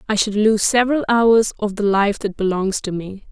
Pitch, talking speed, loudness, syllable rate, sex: 210 Hz, 215 wpm, -18 LUFS, 5.0 syllables/s, female